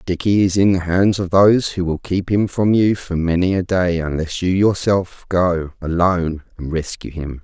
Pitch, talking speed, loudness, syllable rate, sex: 90 Hz, 200 wpm, -18 LUFS, 4.7 syllables/s, male